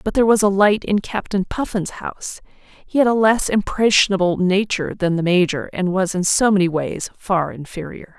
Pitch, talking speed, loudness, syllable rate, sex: 195 Hz, 190 wpm, -18 LUFS, 5.1 syllables/s, female